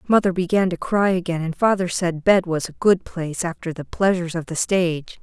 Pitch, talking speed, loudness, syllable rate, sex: 175 Hz, 220 wpm, -21 LUFS, 5.5 syllables/s, female